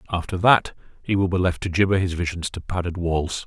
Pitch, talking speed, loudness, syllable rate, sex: 90 Hz, 225 wpm, -22 LUFS, 5.7 syllables/s, male